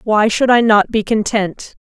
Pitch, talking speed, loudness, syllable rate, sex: 220 Hz, 200 wpm, -14 LUFS, 4.1 syllables/s, female